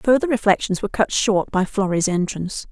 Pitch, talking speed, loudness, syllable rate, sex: 205 Hz, 175 wpm, -20 LUFS, 5.6 syllables/s, female